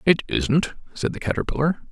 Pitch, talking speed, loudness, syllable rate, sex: 150 Hz, 155 wpm, -23 LUFS, 5.3 syllables/s, male